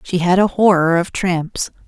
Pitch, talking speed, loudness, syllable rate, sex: 180 Hz, 190 wpm, -16 LUFS, 4.3 syllables/s, female